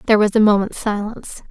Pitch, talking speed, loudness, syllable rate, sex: 210 Hz, 200 wpm, -17 LUFS, 6.9 syllables/s, female